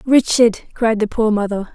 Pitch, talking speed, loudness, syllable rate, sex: 220 Hz, 170 wpm, -16 LUFS, 4.8 syllables/s, female